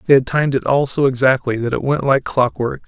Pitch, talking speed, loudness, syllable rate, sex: 130 Hz, 250 wpm, -17 LUFS, 6.0 syllables/s, male